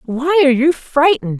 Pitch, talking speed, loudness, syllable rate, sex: 280 Hz, 170 wpm, -14 LUFS, 5.3 syllables/s, female